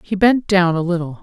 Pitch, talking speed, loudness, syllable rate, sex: 185 Hz, 245 wpm, -16 LUFS, 5.3 syllables/s, female